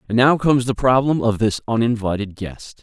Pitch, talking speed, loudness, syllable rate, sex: 120 Hz, 190 wpm, -18 LUFS, 5.4 syllables/s, male